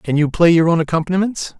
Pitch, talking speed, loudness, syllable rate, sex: 170 Hz, 225 wpm, -16 LUFS, 6.5 syllables/s, male